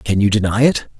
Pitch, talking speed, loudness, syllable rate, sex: 110 Hz, 240 wpm, -16 LUFS, 5.6 syllables/s, male